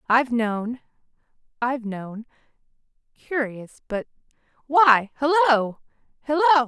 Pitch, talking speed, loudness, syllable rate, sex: 250 Hz, 35 wpm, -22 LUFS, 4.6 syllables/s, female